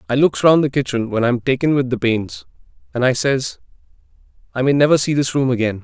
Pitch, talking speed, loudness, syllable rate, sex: 130 Hz, 215 wpm, -17 LUFS, 5.9 syllables/s, male